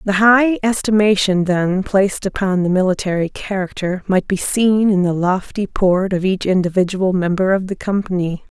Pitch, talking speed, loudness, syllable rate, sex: 190 Hz, 160 wpm, -17 LUFS, 4.8 syllables/s, female